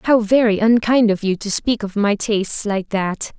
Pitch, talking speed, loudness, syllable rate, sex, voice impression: 215 Hz, 215 wpm, -17 LUFS, 4.5 syllables/s, female, feminine, slightly young, slightly clear, slightly cute, slightly refreshing, friendly